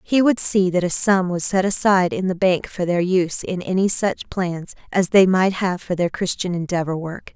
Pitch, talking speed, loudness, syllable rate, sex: 185 Hz, 230 wpm, -19 LUFS, 4.9 syllables/s, female